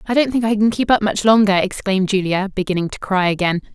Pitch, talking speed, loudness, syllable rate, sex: 200 Hz, 240 wpm, -17 LUFS, 6.4 syllables/s, female